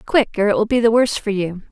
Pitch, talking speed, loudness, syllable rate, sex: 215 Hz, 315 wpm, -17 LUFS, 6.5 syllables/s, female